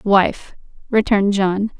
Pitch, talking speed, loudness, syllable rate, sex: 200 Hz, 100 wpm, -17 LUFS, 3.6 syllables/s, female